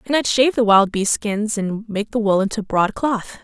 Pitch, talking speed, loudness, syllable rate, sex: 215 Hz, 245 wpm, -18 LUFS, 4.9 syllables/s, female